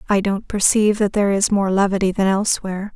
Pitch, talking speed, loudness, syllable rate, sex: 195 Hz, 205 wpm, -18 LUFS, 6.6 syllables/s, female